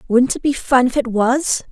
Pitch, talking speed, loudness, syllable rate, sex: 255 Hz, 245 wpm, -17 LUFS, 4.6 syllables/s, female